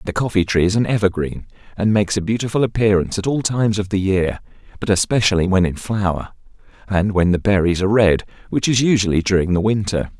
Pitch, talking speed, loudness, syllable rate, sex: 100 Hz, 200 wpm, -18 LUFS, 6.3 syllables/s, male